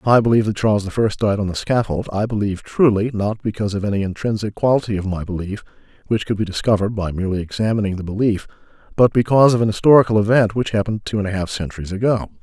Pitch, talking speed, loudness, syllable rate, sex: 105 Hz, 220 wpm, -19 LUFS, 7.2 syllables/s, male